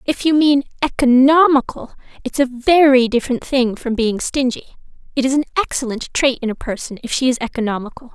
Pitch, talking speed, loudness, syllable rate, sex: 260 Hz, 175 wpm, -17 LUFS, 5.7 syllables/s, female